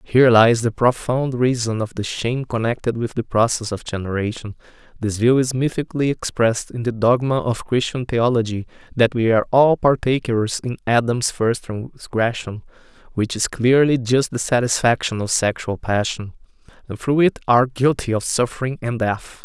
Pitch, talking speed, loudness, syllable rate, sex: 120 Hz, 160 wpm, -19 LUFS, 4.4 syllables/s, male